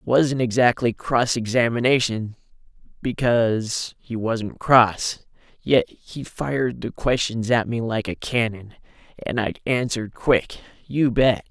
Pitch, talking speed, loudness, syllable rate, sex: 120 Hz, 130 wpm, -22 LUFS, 4.0 syllables/s, male